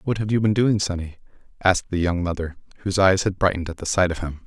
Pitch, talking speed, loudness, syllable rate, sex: 95 Hz, 255 wpm, -22 LUFS, 6.9 syllables/s, male